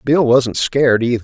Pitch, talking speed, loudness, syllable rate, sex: 125 Hz, 195 wpm, -14 LUFS, 5.3 syllables/s, male